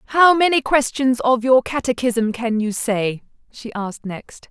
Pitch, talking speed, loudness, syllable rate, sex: 245 Hz, 160 wpm, -18 LUFS, 4.3 syllables/s, female